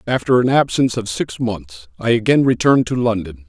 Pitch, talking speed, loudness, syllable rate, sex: 115 Hz, 190 wpm, -17 LUFS, 5.6 syllables/s, male